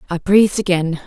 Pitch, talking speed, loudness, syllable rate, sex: 185 Hz, 170 wpm, -16 LUFS, 6.0 syllables/s, female